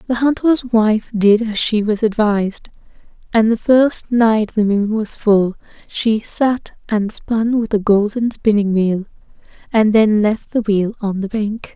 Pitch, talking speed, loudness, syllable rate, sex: 215 Hz, 170 wpm, -16 LUFS, 3.9 syllables/s, female